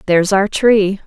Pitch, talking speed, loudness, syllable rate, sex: 200 Hz, 170 wpm, -13 LUFS, 4.7 syllables/s, female